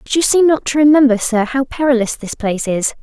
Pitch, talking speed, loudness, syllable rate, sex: 255 Hz, 240 wpm, -14 LUFS, 5.9 syllables/s, female